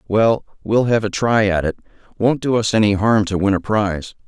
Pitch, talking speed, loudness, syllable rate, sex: 105 Hz, 225 wpm, -18 LUFS, 5.3 syllables/s, male